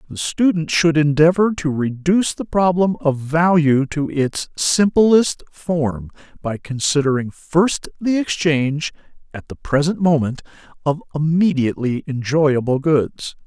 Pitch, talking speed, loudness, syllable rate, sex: 155 Hz, 120 wpm, -18 LUFS, 4.1 syllables/s, male